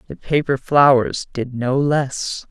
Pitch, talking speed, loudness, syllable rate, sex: 135 Hz, 145 wpm, -18 LUFS, 3.5 syllables/s, female